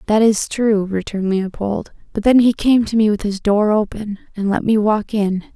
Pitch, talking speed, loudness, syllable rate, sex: 210 Hz, 215 wpm, -17 LUFS, 4.9 syllables/s, female